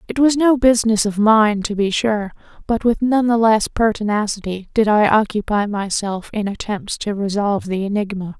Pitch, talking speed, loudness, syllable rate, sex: 215 Hz, 180 wpm, -18 LUFS, 5.0 syllables/s, female